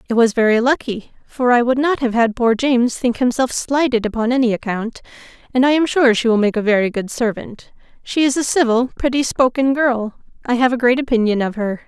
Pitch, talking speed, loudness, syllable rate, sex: 240 Hz, 215 wpm, -17 LUFS, 5.6 syllables/s, female